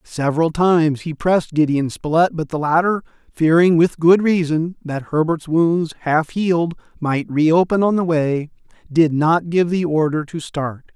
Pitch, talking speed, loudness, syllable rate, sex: 160 Hz, 165 wpm, -18 LUFS, 4.4 syllables/s, male